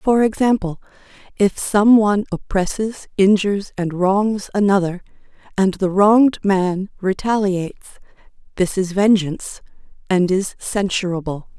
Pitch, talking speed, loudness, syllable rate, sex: 195 Hz, 105 wpm, -18 LUFS, 4.4 syllables/s, female